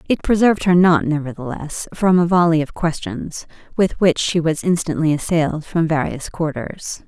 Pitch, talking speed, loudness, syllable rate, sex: 160 Hz, 160 wpm, -18 LUFS, 4.9 syllables/s, female